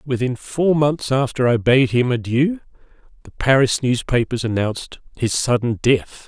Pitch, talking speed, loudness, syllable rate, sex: 125 Hz, 145 wpm, -19 LUFS, 4.4 syllables/s, male